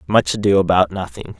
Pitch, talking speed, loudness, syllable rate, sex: 95 Hz, 175 wpm, -17 LUFS, 5.7 syllables/s, male